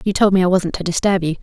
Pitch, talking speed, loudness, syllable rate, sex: 185 Hz, 335 wpm, -17 LUFS, 7.0 syllables/s, female